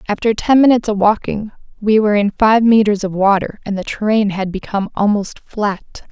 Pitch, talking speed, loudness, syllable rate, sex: 210 Hz, 185 wpm, -15 LUFS, 5.5 syllables/s, female